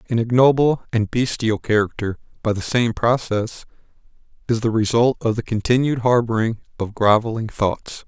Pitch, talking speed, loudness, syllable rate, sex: 115 Hz, 140 wpm, -20 LUFS, 4.9 syllables/s, male